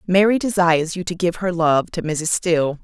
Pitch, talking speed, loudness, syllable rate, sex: 175 Hz, 210 wpm, -19 LUFS, 4.9 syllables/s, female